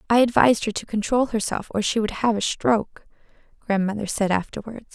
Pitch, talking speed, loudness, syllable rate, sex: 215 Hz, 180 wpm, -22 LUFS, 5.8 syllables/s, female